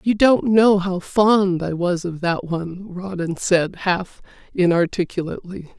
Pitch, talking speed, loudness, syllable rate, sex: 185 Hz, 145 wpm, -19 LUFS, 4.1 syllables/s, female